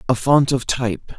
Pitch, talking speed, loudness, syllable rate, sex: 125 Hz, 205 wpm, -18 LUFS, 5.0 syllables/s, male